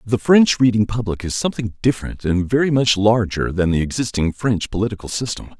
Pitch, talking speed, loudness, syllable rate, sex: 110 Hz, 180 wpm, -18 LUFS, 5.8 syllables/s, male